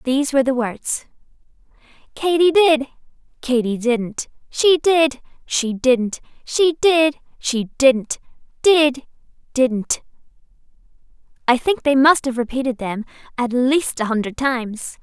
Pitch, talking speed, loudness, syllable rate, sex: 265 Hz, 115 wpm, -18 LUFS, 4.0 syllables/s, female